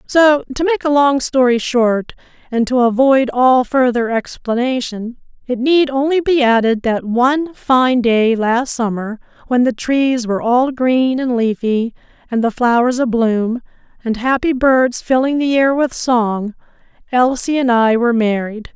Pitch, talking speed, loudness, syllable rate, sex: 250 Hz, 155 wpm, -15 LUFS, 4.2 syllables/s, female